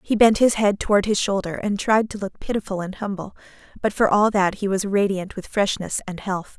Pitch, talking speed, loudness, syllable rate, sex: 200 Hz, 230 wpm, -21 LUFS, 5.4 syllables/s, female